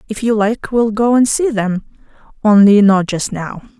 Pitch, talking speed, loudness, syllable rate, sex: 215 Hz, 190 wpm, -14 LUFS, 4.5 syllables/s, female